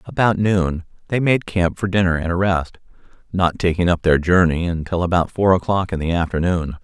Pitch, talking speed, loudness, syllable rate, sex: 90 Hz, 195 wpm, -19 LUFS, 5.2 syllables/s, male